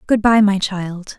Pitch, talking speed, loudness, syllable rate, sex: 200 Hz, 205 wpm, -16 LUFS, 3.8 syllables/s, female